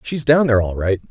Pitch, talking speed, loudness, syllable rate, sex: 120 Hz, 270 wpm, -17 LUFS, 6.5 syllables/s, male